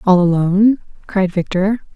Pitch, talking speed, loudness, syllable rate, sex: 195 Hz, 125 wpm, -16 LUFS, 4.6 syllables/s, female